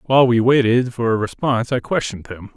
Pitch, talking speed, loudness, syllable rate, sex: 120 Hz, 210 wpm, -18 LUFS, 6.3 syllables/s, male